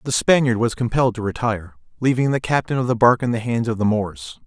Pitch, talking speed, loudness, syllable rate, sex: 120 Hz, 240 wpm, -20 LUFS, 6.4 syllables/s, male